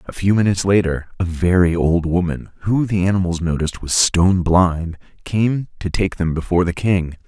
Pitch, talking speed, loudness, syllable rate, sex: 90 Hz, 180 wpm, -18 LUFS, 5.2 syllables/s, male